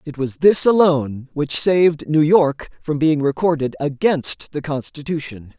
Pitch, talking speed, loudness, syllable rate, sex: 150 Hz, 150 wpm, -18 LUFS, 4.4 syllables/s, male